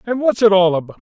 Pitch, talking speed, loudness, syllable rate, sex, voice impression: 200 Hz, 280 wpm, -15 LUFS, 6.7 syllables/s, female, feminine, adult-like, tensed, slightly powerful, clear, fluent, intellectual, calm, unique, lively, slightly sharp